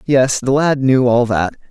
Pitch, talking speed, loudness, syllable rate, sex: 125 Hz, 210 wpm, -14 LUFS, 4.1 syllables/s, male